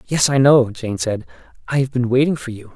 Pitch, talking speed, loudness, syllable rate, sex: 120 Hz, 240 wpm, -18 LUFS, 5.4 syllables/s, male